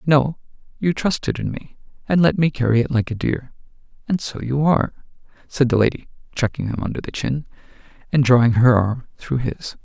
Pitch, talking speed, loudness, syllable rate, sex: 130 Hz, 190 wpm, -20 LUFS, 5.4 syllables/s, male